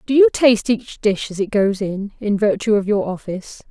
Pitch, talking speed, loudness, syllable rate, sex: 210 Hz, 225 wpm, -18 LUFS, 5.2 syllables/s, female